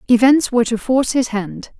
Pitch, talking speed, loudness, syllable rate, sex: 240 Hz, 200 wpm, -16 LUFS, 5.7 syllables/s, female